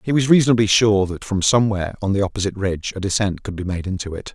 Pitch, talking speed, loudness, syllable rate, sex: 100 Hz, 250 wpm, -19 LUFS, 7.2 syllables/s, male